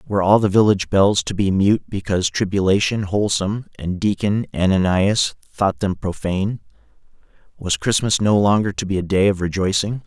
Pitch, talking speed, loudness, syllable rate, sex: 100 Hz, 160 wpm, -19 LUFS, 5.5 syllables/s, male